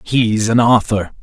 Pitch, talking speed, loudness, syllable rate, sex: 110 Hz, 145 wpm, -14 LUFS, 3.8 syllables/s, male